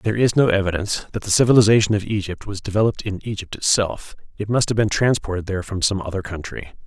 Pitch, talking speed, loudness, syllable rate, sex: 100 Hz, 210 wpm, -20 LUFS, 6.8 syllables/s, male